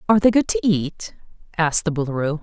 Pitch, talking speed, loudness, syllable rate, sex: 180 Hz, 200 wpm, -20 LUFS, 6.8 syllables/s, female